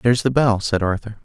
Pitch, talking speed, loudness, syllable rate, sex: 110 Hz, 240 wpm, -19 LUFS, 6.4 syllables/s, male